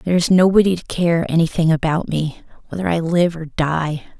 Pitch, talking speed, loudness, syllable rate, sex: 165 Hz, 185 wpm, -18 LUFS, 5.3 syllables/s, female